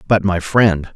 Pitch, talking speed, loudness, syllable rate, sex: 95 Hz, 190 wpm, -15 LUFS, 3.8 syllables/s, male